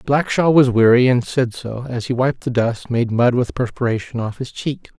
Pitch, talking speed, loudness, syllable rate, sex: 125 Hz, 215 wpm, -18 LUFS, 4.7 syllables/s, male